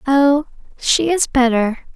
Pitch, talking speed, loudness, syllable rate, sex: 275 Hz, 125 wpm, -16 LUFS, 3.7 syllables/s, female